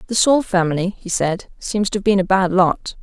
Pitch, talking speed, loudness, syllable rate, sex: 190 Hz, 240 wpm, -18 LUFS, 5.2 syllables/s, female